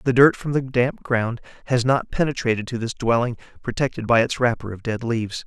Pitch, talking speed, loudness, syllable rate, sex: 120 Hz, 210 wpm, -22 LUFS, 5.6 syllables/s, male